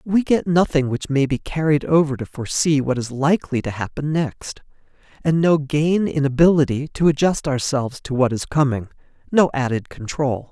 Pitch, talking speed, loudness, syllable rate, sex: 145 Hz, 170 wpm, -20 LUFS, 5.1 syllables/s, male